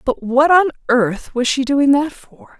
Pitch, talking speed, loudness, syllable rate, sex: 270 Hz, 210 wpm, -16 LUFS, 3.9 syllables/s, female